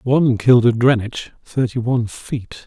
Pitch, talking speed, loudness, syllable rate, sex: 120 Hz, 160 wpm, -17 LUFS, 5.1 syllables/s, male